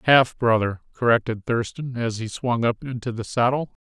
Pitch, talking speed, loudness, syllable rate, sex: 120 Hz, 170 wpm, -23 LUFS, 4.8 syllables/s, male